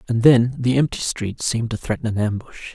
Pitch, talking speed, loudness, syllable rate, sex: 120 Hz, 220 wpm, -20 LUFS, 5.5 syllables/s, male